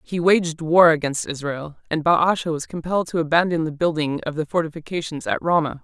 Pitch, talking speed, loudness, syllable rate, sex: 160 Hz, 185 wpm, -21 LUFS, 5.5 syllables/s, female